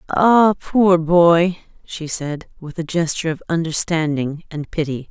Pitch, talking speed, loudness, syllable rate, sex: 165 Hz, 140 wpm, -18 LUFS, 4.1 syllables/s, female